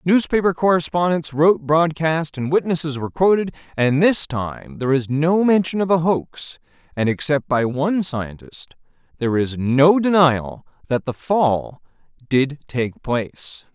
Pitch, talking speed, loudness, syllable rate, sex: 150 Hz, 145 wpm, -19 LUFS, 4.5 syllables/s, male